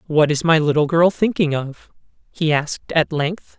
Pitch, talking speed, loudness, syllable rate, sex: 160 Hz, 185 wpm, -18 LUFS, 4.6 syllables/s, female